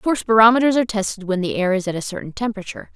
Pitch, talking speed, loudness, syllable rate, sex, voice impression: 210 Hz, 265 wpm, -18 LUFS, 8.3 syllables/s, female, feminine, slightly young, tensed, powerful, bright, clear, fluent, intellectual, friendly, lively, slightly sharp